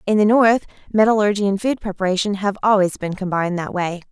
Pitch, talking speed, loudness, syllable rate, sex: 200 Hz, 190 wpm, -18 LUFS, 6.2 syllables/s, female